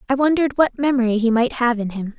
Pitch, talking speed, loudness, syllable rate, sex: 250 Hz, 245 wpm, -19 LUFS, 6.5 syllables/s, female